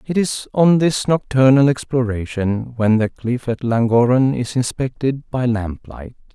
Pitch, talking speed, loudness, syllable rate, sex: 125 Hz, 140 wpm, -18 LUFS, 4.2 syllables/s, male